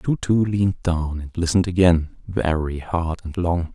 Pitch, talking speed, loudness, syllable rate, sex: 85 Hz, 175 wpm, -21 LUFS, 4.7 syllables/s, male